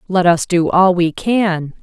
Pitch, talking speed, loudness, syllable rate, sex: 180 Hz, 195 wpm, -15 LUFS, 3.7 syllables/s, female